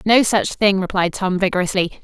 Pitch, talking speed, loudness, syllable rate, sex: 190 Hz, 175 wpm, -18 LUFS, 5.5 syllables/s, female